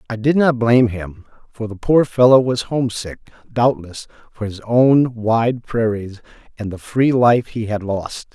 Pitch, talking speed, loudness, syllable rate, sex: 115 Hz, 175 wpm, -17 LUFS, 4.3 syllables/s, male